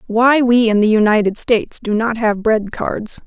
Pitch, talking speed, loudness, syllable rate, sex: 220 Hz, 200 wpm, -15 LUFS, 4.6 syllables/s, female